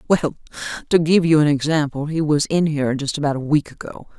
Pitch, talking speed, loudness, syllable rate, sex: 150 Hz, 215 wpm, -19 LUFS, 5.9 syllables/s, female